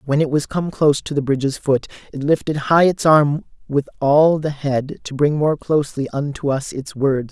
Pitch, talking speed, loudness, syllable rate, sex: 145 Hz, 215 wpm, -18 LUFS, 5.0 syllables/s, male